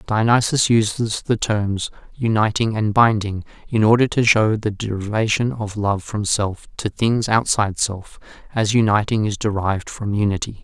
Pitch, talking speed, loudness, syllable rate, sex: 110 Hz, 150 wpm, -19 LUFS, 4.6 syllables/s, male